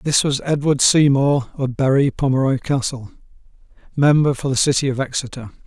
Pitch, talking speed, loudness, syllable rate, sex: 135 Hz, 150 wpm, -18 LUFS, 5.4 syllables/s, male